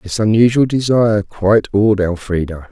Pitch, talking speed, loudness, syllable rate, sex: 105 Hz, 135 wpm, -14 LUFS, 5.1 syllables/s, male